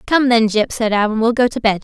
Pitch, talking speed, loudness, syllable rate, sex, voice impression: 230 Hz, 295 wpm, -15 LUFS, 5.9 syllables/s, female, feminine, slightly young, slightly bright, fluent, refreshing, lively